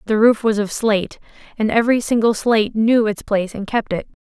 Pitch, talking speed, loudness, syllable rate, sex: 220 Hz, 210 wpm, -18 LUFS, 5.9 syllables/s, female